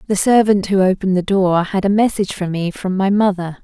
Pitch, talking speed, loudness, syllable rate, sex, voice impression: 190 Hz, 230 wpm, -16 LUFS, 5.8 syllables/s, female, very gender-neutral, slightly adult-like, thin, slightly relaxed, weak, slightly dark, very soft, very clear, fluent, cute, intellectual, very refreshing, sincere, very calm, very friendly, very reassuring, unique, very elegant, sweet, slightly lively, very kind, modest